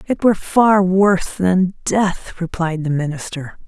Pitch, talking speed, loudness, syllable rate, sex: 180 Hz, 145 wpm, -17 LUFS, 4.2 syllables/s, female